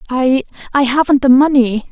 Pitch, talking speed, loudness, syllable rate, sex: 265 Hz, 125 wpm, -13 LUFS, 5.1 syllables/s, female